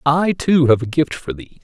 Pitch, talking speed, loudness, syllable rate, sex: 150 Hz, 255 wpm, -17 LUFS, 4.6 syllables/s, male